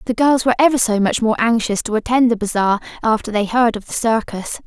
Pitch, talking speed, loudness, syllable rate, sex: 225 Hz, 230 wpm, -17 LUFS, 6.0 syllables/s, female